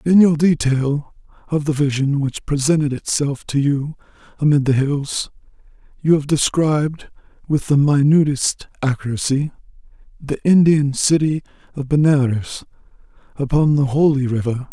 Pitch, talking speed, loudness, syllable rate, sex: 145 Hz, 120 wpm, -18 LUFS, 4.6 syllables/s, male